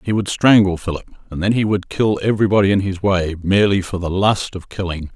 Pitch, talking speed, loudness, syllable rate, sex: 95 Hz, 220 wpm, -17 LUFS, 5.9 syllables/s, male